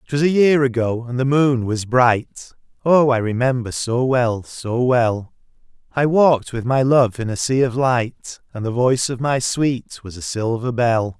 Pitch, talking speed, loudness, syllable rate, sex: 125 Hz, 195 wpm, -18 LUFS, 3.7 syllables/s, male